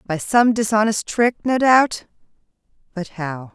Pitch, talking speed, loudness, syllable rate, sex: 215 Hz, 120 wpm, -18 LUFS, 4.1 syllables/s, female